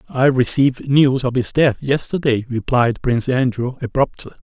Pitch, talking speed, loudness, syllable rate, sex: 130 Hz, 145 wpm, -17 LUFS, 5.0 syllables/s, male